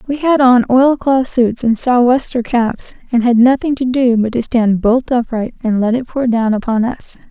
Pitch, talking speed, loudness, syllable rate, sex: 240 Hz, 220 wpm, -14 LUFS, 4.6 syllables/s, female